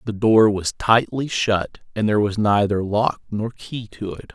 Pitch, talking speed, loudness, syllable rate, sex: 105 Hz, 195 wpm, -20 LUFS, 4.3 syllables/s, male